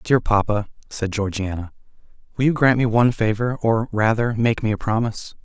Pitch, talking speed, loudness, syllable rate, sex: 110 Hz, 175 wpm, -20 LUFS, 5.5 syllables/s, male